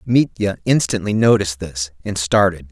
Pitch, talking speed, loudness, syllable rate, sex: 100 Hz, 135 wpm, -18 LUFS, 5.0 syllables/s, male